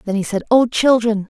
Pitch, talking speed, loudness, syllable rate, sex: 225 Hz, 215 wpm, -16 LUFS, 5.0 syllables/s, female